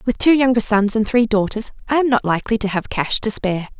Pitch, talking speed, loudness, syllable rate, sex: 225 Hz, 255 wpm, -17 LUFS, 6.1 syllables/s, female